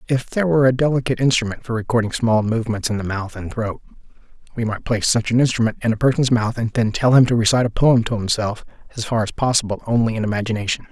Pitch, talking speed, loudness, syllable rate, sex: 115 Hz, 230 wpm, -19 LUFS, 7.0 syllables/s, male